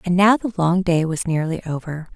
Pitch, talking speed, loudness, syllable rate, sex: 175 Hz, 225 wpm, -20 LUFS, 5.2 syllables/s, female